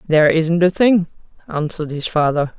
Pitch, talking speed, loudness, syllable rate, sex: 165 Hz, 160 wpm, -17 LUFS, 5.6 syllables/s, female